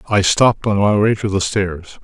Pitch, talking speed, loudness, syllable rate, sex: 100 Hz, 235 wpm, -16 LUFS, 5.0 syllables/s, male